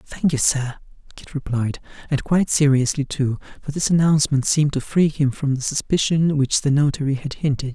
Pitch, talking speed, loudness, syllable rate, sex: 140 Hz, 185 wpm, -20 LUFS, 5.4 syllables/s, male